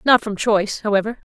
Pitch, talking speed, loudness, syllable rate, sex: 215 Hz, 180 wpm, -19 LUFS, 6.3 syllables/s, female